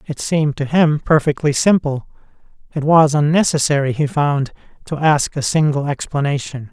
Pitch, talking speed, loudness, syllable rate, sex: 145 Hz, 145 wpm, -16 LUFS, 5.0 syllables/s, male